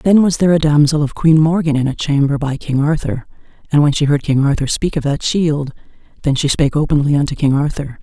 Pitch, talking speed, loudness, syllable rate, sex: 150 Hz, 230 wpm, -15 LUFS, 6.1 syllables/s, female